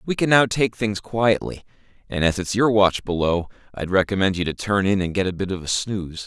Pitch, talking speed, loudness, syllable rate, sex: 100 Hz, 240 wpm, -21 LUFS, 5.5 syllables/s, male